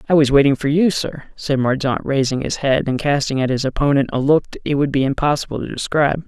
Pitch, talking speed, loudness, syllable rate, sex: 140 Hz, 230 wpm, -18 LUFS, 6.1 syllables/s, male